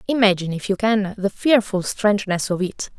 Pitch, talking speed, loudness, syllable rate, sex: 200 Hz, 180 wpm, -20 LUFS, 5.5 syllables/s, female